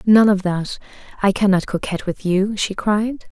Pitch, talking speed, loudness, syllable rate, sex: 200 Hz, 160 wpm, -19 LUFS, 4.5 syllables/s, female